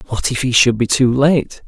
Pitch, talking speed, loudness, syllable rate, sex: 130 Hz, 250 wpm, -14 LUFS, 4.8 syllables/s, male